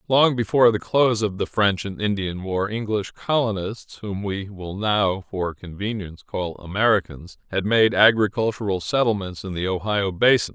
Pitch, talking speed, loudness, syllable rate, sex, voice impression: 100 Hz, 150 wpm, -22 LUFS, 4.9 syllables/s, male, very masculine, very middle-aged, very thick, tensed, powerful, dark, very hard, muffled, fluent, slightly raspy, cool, intellectual, slightly refreshing, very sincere, very calm, mature, friendly, very reassuring, very unique, very elegant, very wild, sweet, slightly lively, strict, slightly intense, slightly modest